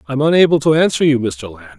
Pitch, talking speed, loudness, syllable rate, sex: 145 Hz, 235 wpm, -14 LUFS, 6.4 syllables/s, male